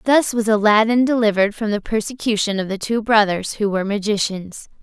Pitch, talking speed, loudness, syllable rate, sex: 215 Hz, 175 wpm, -18 LUFS, 5.7 syllables/s, female